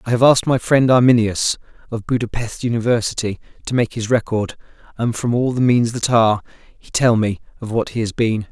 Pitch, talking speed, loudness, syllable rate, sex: 115 Hz, 205 wpm, -18 LUFS, 5.6 syllables/s, male